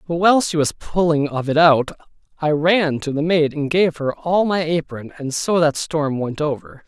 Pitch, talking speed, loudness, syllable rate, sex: 155 Hz, 220 wpm, -19 LUFS, 4.7 syllables/s, male